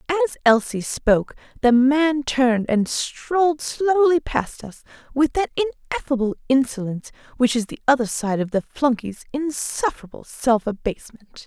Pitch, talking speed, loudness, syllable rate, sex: 265 Hz, 135 wpm, -21 LUFS, 5.0 syllables/s, female